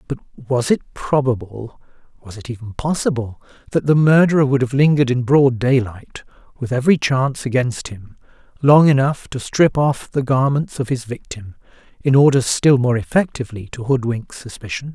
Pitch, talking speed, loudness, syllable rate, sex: 130 Hz, 155 wpm, -17 LUFS, 5.1 syllables/s, male